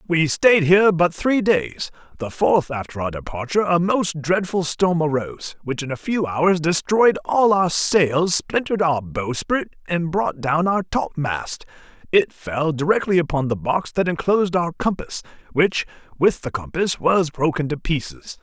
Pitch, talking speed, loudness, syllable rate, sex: 165 Hz, 165 wpm, -20 LUFS, 4.4 syllables/s, male